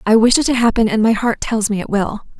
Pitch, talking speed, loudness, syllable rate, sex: 220 Hz, 300 wpm, -16 LUFS, 6.2 syllables/s, female